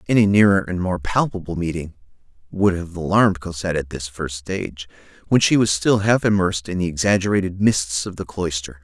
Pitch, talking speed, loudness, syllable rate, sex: 90 Hz, 185 wpm, -20 LUFS, 5.7 syllables/s, male